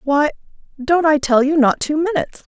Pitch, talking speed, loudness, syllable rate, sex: 290 Hz, 190 wpm, -16 LUFS, 5.3 syllables/s, female